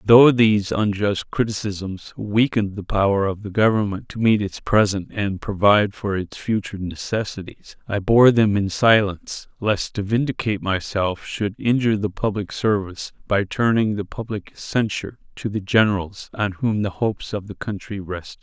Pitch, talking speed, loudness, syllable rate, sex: 105 Hz, 165 wpm, -21 LUFS, 4.9 syllables/s, male